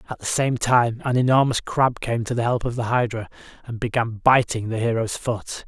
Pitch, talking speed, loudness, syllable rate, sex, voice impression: 120 Hz, 210 wpm, -22 LUFS, 5.1 syllables/s, male, masculine, slightly middle-aged, slightly thick, slightly fluent, cool, slightly wild